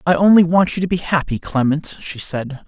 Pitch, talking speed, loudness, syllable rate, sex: 160 Hz, 225 wpm, -17 LUFS, 5.2 syllables/s, male